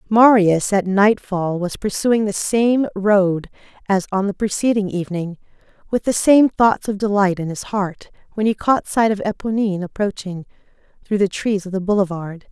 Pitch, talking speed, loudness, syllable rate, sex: 200 Hz, 170 wpm, -18 LUFS, 4.8 syllables/s, female